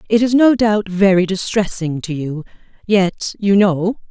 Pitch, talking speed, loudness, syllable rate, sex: 195 Hz, 160 wpm, -16 LUFS, 4.1 syllables/s, female